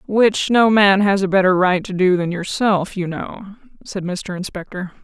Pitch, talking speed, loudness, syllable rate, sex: 190 Hz, 190 wpm, -17 LUFS, 4.5 syllables/s, female